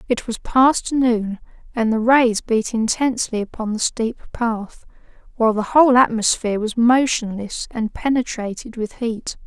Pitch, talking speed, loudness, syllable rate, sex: 230 Hz, 145 wpm, -19 LUFS, 4.5 syllables/s, female